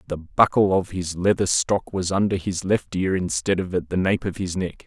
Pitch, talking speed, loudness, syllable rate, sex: 90 Hz, 235 wpm, -22 LUFS, 4.9 syllables/s, male